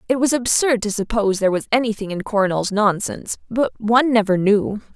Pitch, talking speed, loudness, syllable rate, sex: 215 Hz, 180 wpm, -19 LUFS, 6.0 syllables/s, female